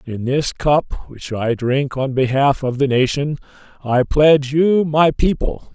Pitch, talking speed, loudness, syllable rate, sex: 140 Hz, 165 wpm, -17 LUFS, 3.9 syllables/s, male